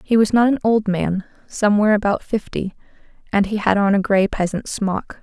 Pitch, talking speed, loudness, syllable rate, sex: 205 Hz, 195 wpm, -19 LUFS, 5.3 syllables/s, female